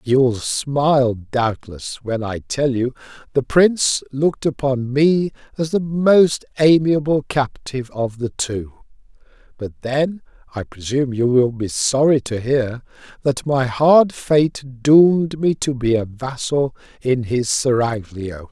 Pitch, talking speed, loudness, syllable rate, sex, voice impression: 130 Hz, 140 wpm, -18 LUFS, 3.7 syllables/s, male, very masculine, old, thick, relaxed, slightly weak, bright, slightly soft, muffled, fluent, slightly raspy, cool, slightly intellectual, refreshing, sincere, very calm, mature, friendly, slightly reassuring, unique, slightly elegant, wild, slightly sweet, lively, kind, modest